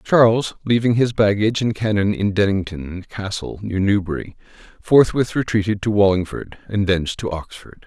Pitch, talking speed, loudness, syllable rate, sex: 100 Hz, 145 wpm, -19 LUFS, 5.1 syllables/s, male